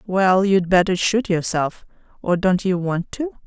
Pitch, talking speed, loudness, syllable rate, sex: 190 Hz, 175 wpm, -19 LUFS, 4.2 syllables/s, female